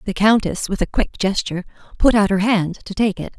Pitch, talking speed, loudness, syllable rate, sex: 200 Hz, 230 wpm, -19 LUFS, 5.9 syllables/s, female